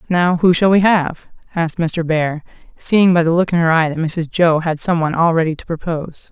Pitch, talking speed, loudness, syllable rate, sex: 165 Hz, 240 wpm, -16 LUFS, 5.4 syllables/s, female